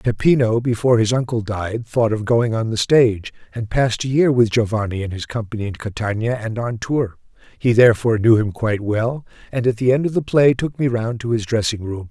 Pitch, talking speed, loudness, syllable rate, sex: 115 Hz, 225 wpm, -19 LUFS, 5.6 syllables/s, male